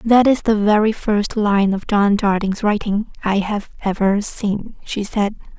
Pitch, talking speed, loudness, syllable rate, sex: 205 Hz, 170 wpm, -18 LUFS, 4.3 syllables/s, female